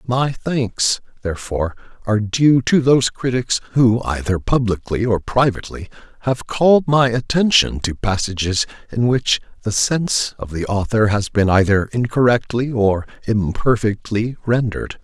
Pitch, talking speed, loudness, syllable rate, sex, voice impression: 115 Hz, 130 wpm, -18 LUFS, 4.7 syllables/s, male, very masculine, very adult-like, old, very thick, tensed, very powerful, very bright, soft, muffled, fluent, raspy, very cool, intellectual, very sincere, very calm, very mature, friendly, very reassuring, very unique, slightly elegant, very wild, sweet, very lively, kind